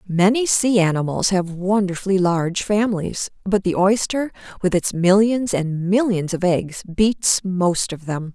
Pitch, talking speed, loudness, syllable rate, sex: 190 Hz, 150 wpm, -19 LUFS, 4.4 syllables/s, female